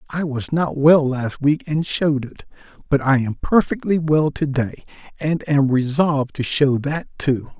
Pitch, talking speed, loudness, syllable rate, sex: 145 Hz, 180 wpm, -19 LUFS, 4.3 syllables/s, male